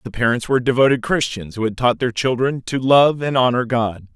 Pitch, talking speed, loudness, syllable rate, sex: 125 Hz, 215 wpm, -18 LUFS, 5.6 syllables/s, male